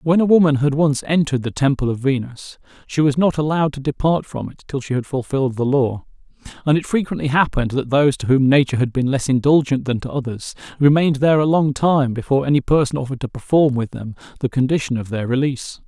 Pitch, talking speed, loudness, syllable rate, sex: 140 Hz, 220 wpm, -18 LUFS, 6.4 syllables/s, male